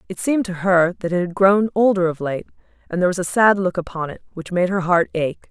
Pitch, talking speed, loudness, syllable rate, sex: 180 Hz, 260 wpm, -19 LUFS, 6.1 syllables/s, female